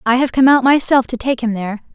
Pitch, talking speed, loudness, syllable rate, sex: 245 Hz, 280 wpm, -14 LUFS, 6.5 syllables/s, female